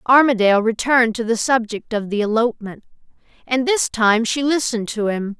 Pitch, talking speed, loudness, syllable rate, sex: 230 Hz, 165 wpm, -18 LUFS, 5.6 syllables/s, female